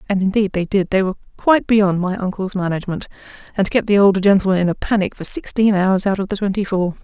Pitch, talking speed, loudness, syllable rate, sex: 195 Hz, 230 wpm, -18 LUFS, 6.3 syllables/s, female